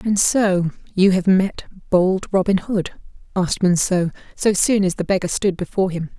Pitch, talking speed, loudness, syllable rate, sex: 190 Hz, 175 wpm, -19 LUFS, 4.9 syllables/s, female